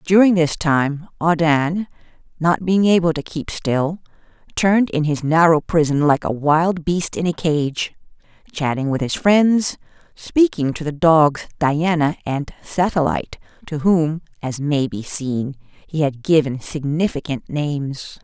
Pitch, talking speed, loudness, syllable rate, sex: 160 Hz, 145 wpm, -19 LUFS, 4.1 syllables/s, female